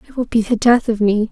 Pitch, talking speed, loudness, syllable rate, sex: 225 Hz, 320 wpm, -16 LUFS, 6.1 syllables/s, female